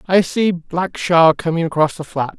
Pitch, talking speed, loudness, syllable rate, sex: 170 Hz, 175 wpm, -17 LUFS, 4.4 syllables/s, male